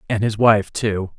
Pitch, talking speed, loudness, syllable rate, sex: 105 Hz, 205 wpm, -18 LUFS, 4.0 syllables/s, male